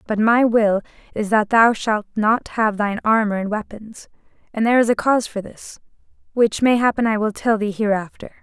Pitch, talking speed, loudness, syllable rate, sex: 220 Hz, 190 wpm, -18 LUFS, 5.4 syllables/s, female